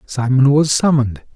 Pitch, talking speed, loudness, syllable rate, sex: 135 Hz, 135 wpm, -15 LUFS, 5.1 syllables/s, male